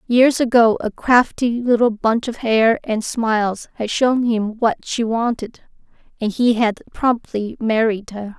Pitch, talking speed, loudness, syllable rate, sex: 230 Hz, 155 wpm, -18 LUFS, 3.9 syllables/s, female